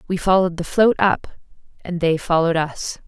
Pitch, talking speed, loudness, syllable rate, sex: 175 Hz, 175 wpm, -19 LUFS, 5.2 syllables/s, female